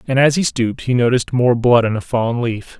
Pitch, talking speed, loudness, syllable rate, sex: 120 Hz, 255 wpm, -16 LUFS, 6.0 syllables/s, male